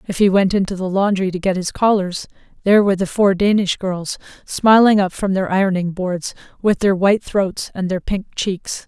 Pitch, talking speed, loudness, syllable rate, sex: 195 Hz, 205 wpm, -17 LUFS, 5.2 syllables/s, female